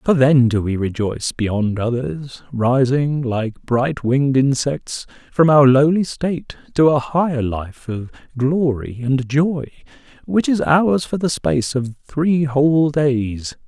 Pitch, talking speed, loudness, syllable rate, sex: 135 Hz, 150 wpm, -18 LUFS, 3.8 syllables/s, male